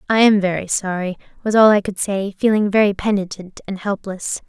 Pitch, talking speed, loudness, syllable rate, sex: 200 Hz, 175 wpm, -18 LUFS, 5.2 syllables/s, female